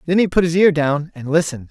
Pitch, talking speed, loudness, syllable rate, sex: 160 Hz, 280 wpm, -17 LUFS, 6.6 syllables/s, male